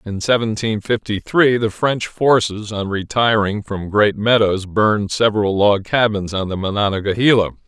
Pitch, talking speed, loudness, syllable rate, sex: 105 Hz, 150 wpm, -17 LUFS, 4.6 syllables/s, male